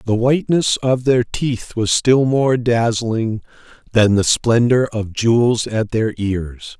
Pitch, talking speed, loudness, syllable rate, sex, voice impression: 115 Hz, 150 wpm, -17 LUFS, 3.7 syllables/s, male, masculine, very adult-like, cool, slightly intellectual, slightly wild